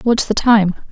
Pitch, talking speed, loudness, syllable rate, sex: 215 Hz, 195 wpm, -14 LUFS, 4.4 syllables/s, female